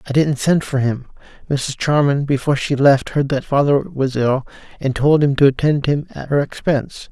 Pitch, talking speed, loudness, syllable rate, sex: 140 Hz, 200 wpm, -17 LUFS, 5.1 syllables/s, male